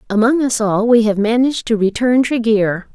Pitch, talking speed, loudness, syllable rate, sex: 230 Hz, 185 wpm, -15 LUFS, 5.2 syllables/s, female